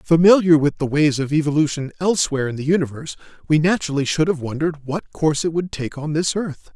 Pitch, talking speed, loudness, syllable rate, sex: 155 Hz, 205 wpm, -19 LUFS, 6.4 syllables/s, male